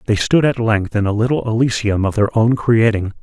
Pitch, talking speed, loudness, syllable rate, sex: 110 Hz, 225 wpm, -16 LUFS, 5.3 syllables/s, male